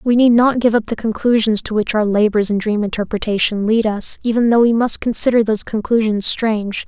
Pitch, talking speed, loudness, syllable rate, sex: 220 Hz, 210 wpm, -16 LUFS, 5.6 syllables/s, female